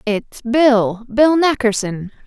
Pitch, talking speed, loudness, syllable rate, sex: 240 Hz, 80 wpm, -16 LUFS, 3.0 syllables/s, female